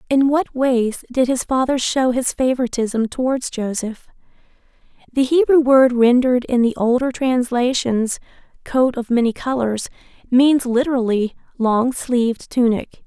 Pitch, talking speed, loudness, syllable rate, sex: 250 Hz, 130 wpm, -18 LUFS, 4.4 syllables/s, female